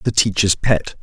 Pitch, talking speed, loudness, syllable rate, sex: 100 Hz, 175 wpm, -17 LUFS, 4.4 syllables/s, male